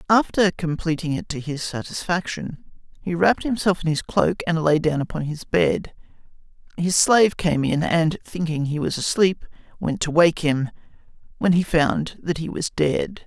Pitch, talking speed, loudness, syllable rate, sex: 160 Hz, 170 wpm, -22 LUFS, 4.6 syllables/s, male